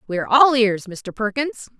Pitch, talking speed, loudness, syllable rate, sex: 225 Hz, 200 wpm, -18 LUFS, 5.3 syllables/s, female